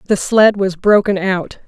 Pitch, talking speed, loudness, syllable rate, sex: 195 Hz, 180 wpm, -14 LUFS, 4.1 syllables/s, female